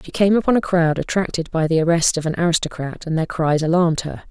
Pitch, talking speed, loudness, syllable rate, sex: 165 Hz, 235 wpm, -19 LUFS, 6.3 syllables/s, female